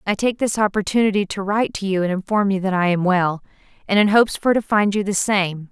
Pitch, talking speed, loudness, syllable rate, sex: 200 Hz, 250 wpm, -19 LUFS, 6.0 syllables/s, female